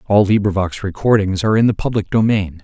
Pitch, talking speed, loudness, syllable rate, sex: 100 Hz, 180 wpm, -16 LUFS, 6.1 syllables/s, male